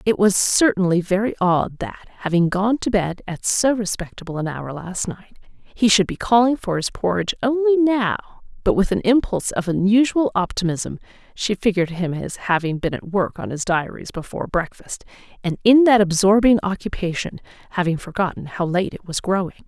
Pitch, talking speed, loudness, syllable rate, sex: 195 Hz, 175 wpm, -20 LUFS, 5.3 syllables/s, female